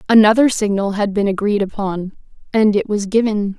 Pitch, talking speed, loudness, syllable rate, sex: 210 Hz, 165 wpm, -17 LUFS, 5.2 syllables/s, female